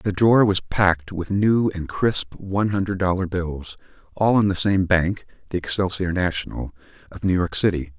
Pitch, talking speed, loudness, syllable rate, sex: 90 Hz, 180 wpm, -21 LUFS, 5.0 syllables/s, male